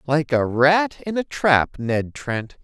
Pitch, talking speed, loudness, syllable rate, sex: 145 Hz, 180 wpm, -20 LUFS, 3.3 syllables/s, male